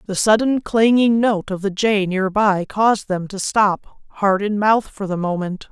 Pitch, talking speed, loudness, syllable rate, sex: 205 Hz, 200 wpm, -18 LUFS, 4.3 syllables/s, female